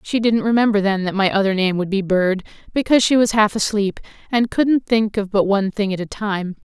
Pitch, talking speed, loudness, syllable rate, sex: 205 Hz, 230 wpm, -18 LUFS, 5.6 syllables/s, female